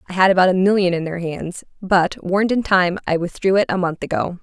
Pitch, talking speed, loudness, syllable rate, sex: 185 Hz, 245 wpm, -18 LUFS, 5.8 syllables/s, female